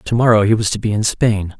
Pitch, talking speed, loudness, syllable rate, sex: 110 Hz, 300 wpm, -15 LUFS, 5.8 syllables/s, male